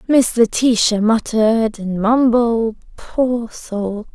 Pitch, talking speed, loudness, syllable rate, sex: 225 Hz, 100 wpm, -17 LUFS, 3.2 syllables/s, female